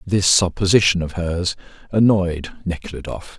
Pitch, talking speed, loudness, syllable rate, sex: 90 Hz, 105 wpm, -19 LUFS, 4.2 syllables/s, male